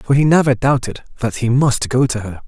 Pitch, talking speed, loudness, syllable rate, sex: 125 Hz, 245 wpm, -16 LUFS, 5.5 syllables/s, male